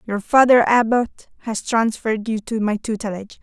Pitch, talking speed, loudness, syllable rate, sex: 220 Hz, 155 wpm, -19 LUFS, 5.2 syllables/s, female